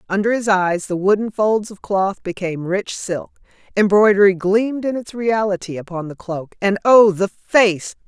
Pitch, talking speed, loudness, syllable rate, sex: 200 Hz, 170 wpm, -18 LUFS, 4.7 syllables/s, female